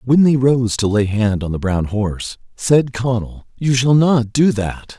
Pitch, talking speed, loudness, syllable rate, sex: 120 Hz, 205 wpm, -16 LUFS, 4.2 syllables/s, male